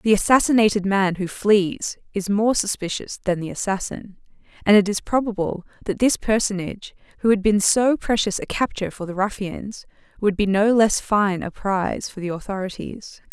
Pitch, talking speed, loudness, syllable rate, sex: 205 Hz, 170 wpm, -21 LUFS, 5.0 syllables/s, female